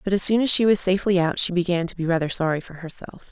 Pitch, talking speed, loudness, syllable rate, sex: 180 Hz, 290 wpm, -20 LUFS, 6.9 syllables/s, female